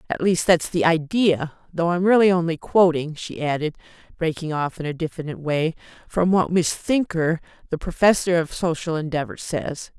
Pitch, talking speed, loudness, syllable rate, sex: 165 Hz, 160 wpm, -22 LUFS, 4.9 syllables/s, female